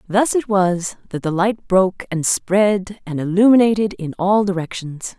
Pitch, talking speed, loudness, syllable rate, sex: 195 Hz, 160 wpm, -18 LUFS, 4.4 syllables/s, female